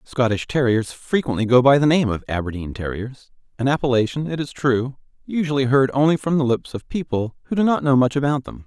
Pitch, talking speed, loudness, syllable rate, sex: 130 Hz, 200 wpm, -20 LUFS, 5.7 syllables/s, male